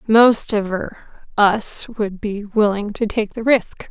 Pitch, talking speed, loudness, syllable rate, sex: 210 Hz, 140 wpm, -19 LUFS, 3.6 syllables/s, female